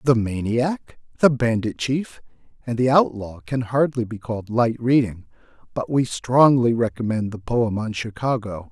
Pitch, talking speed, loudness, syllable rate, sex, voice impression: 120 Hz, 150 wpm, -21 LUFS, 4.5 syllables/s, male, very masculine, very adult-like, very middle-aged, very thick, slightly relaxed, slightly powerful, slightly bright, slightly soft, muffled, slightly fluent, slightly raspy, cool, very intellectual, refreshing, sincere, calm, very mature, friendly, slightly unique, slightly elegant, wild, sweet, slightly lively, kind, slightly sharp